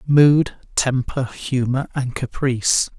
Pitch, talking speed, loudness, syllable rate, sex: 130 Hz, 100 wpm, -20 LUFS, 3.4 syllables/s, male